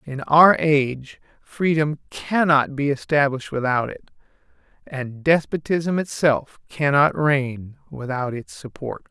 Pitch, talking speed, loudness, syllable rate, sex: 145 Hz, 110 wpm, -20 LUFS, 3.9 syllables/s, male